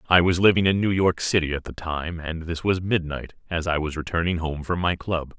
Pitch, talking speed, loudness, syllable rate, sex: 85 Hz, 245 wpm, -24 LUFS, 5.3 syllables/s, male